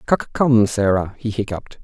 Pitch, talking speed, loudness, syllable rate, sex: 105 Hz, 165 wpm, -19 LUFS, 4.9 syllables/s, male